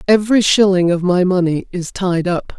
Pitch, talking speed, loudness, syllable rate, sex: 185 Hz, 185 wpm, -15 LUFS, 5.0 syllables/s, female